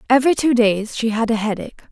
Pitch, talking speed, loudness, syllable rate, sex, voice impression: 230 Hz, 220 wpm, -18 LUFS, 6.7 syllables/s, female, feminine, slightly young, slightly powerful, slightly bright, slightly clear, slightly cute, slightly friendly, lively, slightly sharp